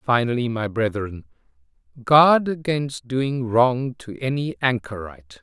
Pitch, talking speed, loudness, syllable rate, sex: 120 Hz, 110 wpm, -21 LUFS, 4.0 syllables/s, male